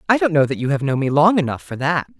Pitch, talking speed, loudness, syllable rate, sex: 155 Hz, 330 wpm, -18 LUFS, 6.8 syllables/s, male